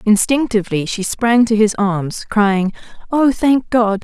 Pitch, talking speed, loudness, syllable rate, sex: 220 Hz, 150 wpm, -16 LUFS, 4.0 syllables/s, female